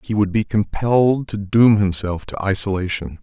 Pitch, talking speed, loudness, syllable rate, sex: 100 Hz, 165 wpm, -18 LUFS, 4.8 syllables/s, male